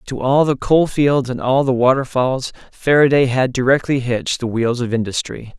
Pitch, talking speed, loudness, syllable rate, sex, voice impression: 130 Hz, 185 wpm, -17 LUFS, 4.9 syllables/s, male, masculine, slightly young, adult-like, slightly thick, tensed, slightly powerful, slightly bright, slightly hard, clear, fluent, cool, slightly intellectual, refreshing, very sincere, calm, friendly, reassuring, slightly unique, elegant, sweet, slightly lively, very kind, modest